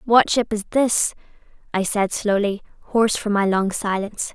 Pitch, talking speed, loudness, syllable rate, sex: 210 Hz, 165 wpm, -21 LUFS, 4.9 syllables/s, female